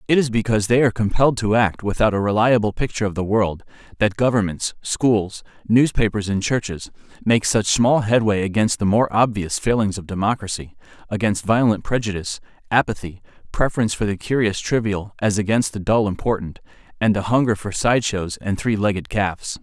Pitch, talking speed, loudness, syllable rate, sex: 105 Hz, 170 wpm, -20 LUFS, 5.7 syllables/s, male